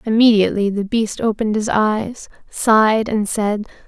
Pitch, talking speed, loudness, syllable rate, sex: 215 Hz, 140 wpm, -17 LUFS, 4.8 syllables/s, female